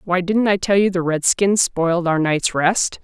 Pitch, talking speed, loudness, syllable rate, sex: 180 Hz, 215 wpm, -18 LUFS, 4.5 syllables/s, female